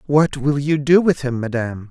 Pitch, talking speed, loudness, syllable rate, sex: 140 Hz, 220 wpm, -18 LUFS, 5.1 syllables/s, male